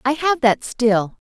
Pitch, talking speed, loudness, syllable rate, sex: 250 Hz, 180 wpm, -18 LUFS, 3.7 syllables/s, female